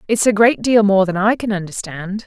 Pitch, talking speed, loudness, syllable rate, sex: 205 Hz, 240 wpm, -16 LUFS, 5.3 syllables/s, female